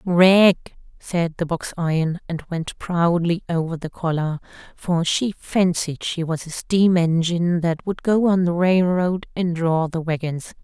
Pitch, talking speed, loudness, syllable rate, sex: 170 Hz, 165 wpm, -21 LUFS, 4.0 syllables/s, female